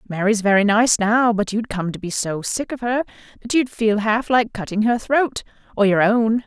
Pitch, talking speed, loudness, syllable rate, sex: 220 Hz, 215 wpm, -19 LUFS, 4.9 syllables/s, female